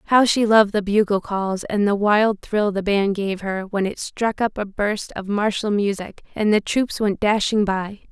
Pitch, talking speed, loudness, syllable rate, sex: 205 Hz, 215 wpm, -20 LUFS, 4.5 syllables/s, female